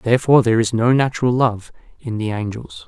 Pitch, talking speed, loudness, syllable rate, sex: 115 Hz, 190 wpm, -17 LUFS, 6.3 syllables/s, male